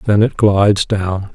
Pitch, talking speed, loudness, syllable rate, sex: 100 Hz, 180 wpm, -14 LUFS, 4.2 syllables/s, male